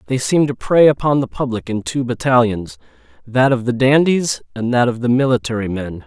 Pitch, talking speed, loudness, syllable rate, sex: 125 Hz, 190 wpm, -17 LUFS, 5.3 syllables/s, male